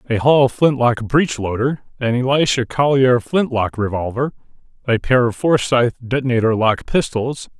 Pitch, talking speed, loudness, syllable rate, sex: 125 Hz, 135 wpm, -17 LUFS, 4.8 syllables/s, male